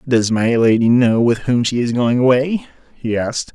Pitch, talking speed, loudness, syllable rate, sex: 120 Hz, 205 wpm, -16 LUFS, 4.8 syllables/s, male